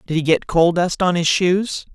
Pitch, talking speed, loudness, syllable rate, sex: 175 Hz, 245 wpm, -17 LUFS, 4.6 syllables/s, male